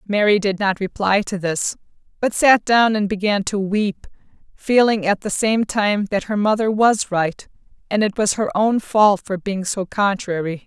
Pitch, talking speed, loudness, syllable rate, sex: 205 Hz, 185 wpm, -19 LUFS, 4.4 syllables/s, female